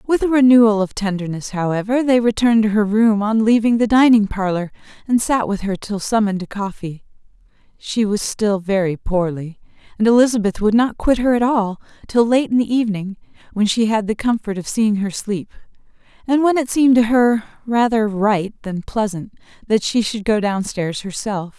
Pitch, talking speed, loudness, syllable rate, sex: 215 Hz, 185 wpm, -17 LUFS, 5.2 syllables/s, female